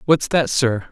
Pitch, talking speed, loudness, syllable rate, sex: 135 Hz, 195 wpm, -18 LUFS, 3.9 syllables/s, male